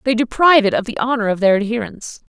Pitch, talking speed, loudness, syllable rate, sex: 225 Hz, 230 wpm, -16 LUFS, 7.2 syllables/s, female